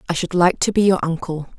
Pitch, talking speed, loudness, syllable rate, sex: 175 Hz, 265 wpm, -18 LUFS, 6.1 syllables/s, female